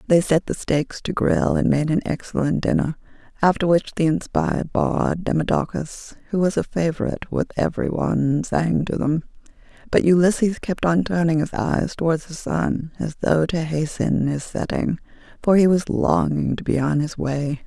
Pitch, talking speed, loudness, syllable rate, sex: 160 Hz, 175 wpm, -21 LUFS, 4.8 syllables/s, female